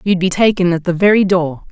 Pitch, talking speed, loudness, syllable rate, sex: 180 Hz, 245 wpm, -14 LUFS, 5.7 syllables/s, female